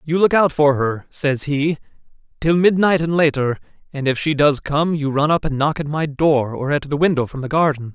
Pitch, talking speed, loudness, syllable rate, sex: 150 Hz, 235 wpm, -18 LUFS, 5.1 syllables/s, male